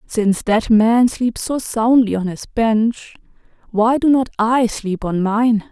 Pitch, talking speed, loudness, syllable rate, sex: 225 Hz, 170 wpm, -17 LUFS, 3.7 syllables/s, female